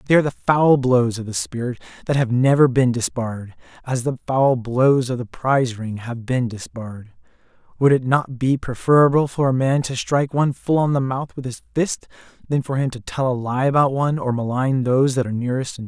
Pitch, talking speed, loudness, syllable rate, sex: 125 Hz, 225 wpm, -20 LUFS, 2.4 syllables/s, male